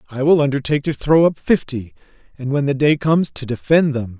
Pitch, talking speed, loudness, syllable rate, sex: 140 Hz, 215 wpm, -17 LUFS, 5.9 syllables/s, male